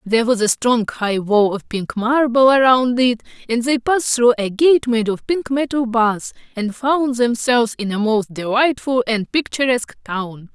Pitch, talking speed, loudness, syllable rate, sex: 240 Hz, 180 wpm, -17 LUFS, 4.6 syllables/s, female